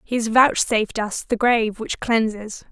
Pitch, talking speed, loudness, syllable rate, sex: 225 Hz, 175 wpm, -20 LUFS, 4.8 syllables/s, female